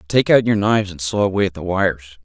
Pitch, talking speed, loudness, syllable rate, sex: 95 Hz, 270 wpm, -18 LUFS, 6.9 syllables/s, male